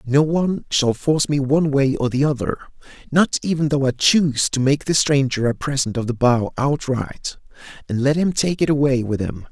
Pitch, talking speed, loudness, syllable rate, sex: 135 Hz, 210 wpm, -19 LUFS, 5.3 syllables/s, male